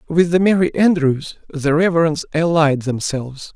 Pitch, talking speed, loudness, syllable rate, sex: 160 Hz, 135 wpm, -17 LUFS, 4.8 syllables/s, male